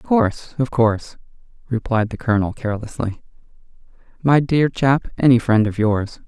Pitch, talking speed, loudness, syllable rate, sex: 120 Hz, 135 wpm, -19 LUFS, 5.3 syllables/s, male